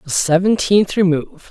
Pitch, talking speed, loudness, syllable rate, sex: 180 Hz, 120 wpm, -15 LUFS, 5.0 syllables/s, male